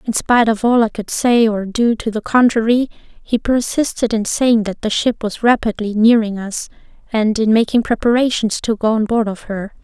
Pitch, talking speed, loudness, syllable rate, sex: 225 Hz, 200 wpm, -16 LUFS, 5.0 syllables/s, female